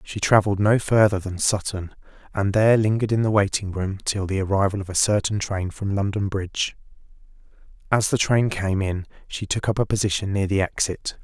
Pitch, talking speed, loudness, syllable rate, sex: 100 Hz, 190 wpm, -22 LUFS, 5.6 syllables/s, male